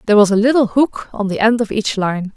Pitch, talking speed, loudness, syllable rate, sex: 215 Hz, 280 wpm, -15 LUFS, 5.9 syllables/s, female